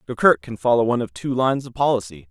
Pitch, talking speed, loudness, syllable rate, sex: 115 Hz, 235 wpm, -20 LUFS, 6.9 syllables/s, male